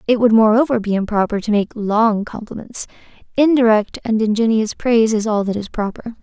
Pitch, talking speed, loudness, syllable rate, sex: 220 Hz, 175 wpm, -17 LUFS, 5.4 syllables/s, female